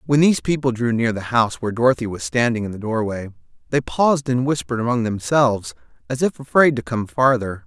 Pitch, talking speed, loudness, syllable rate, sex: 120 Hz, 205 wpm, -20 LUFS, 6.2 syllables/s, male